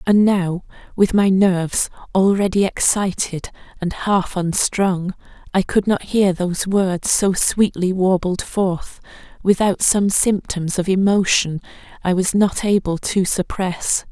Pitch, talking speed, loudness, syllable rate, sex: 190 Hz, 130 wpm, -18 LUFS, 3.9 syllables/s, female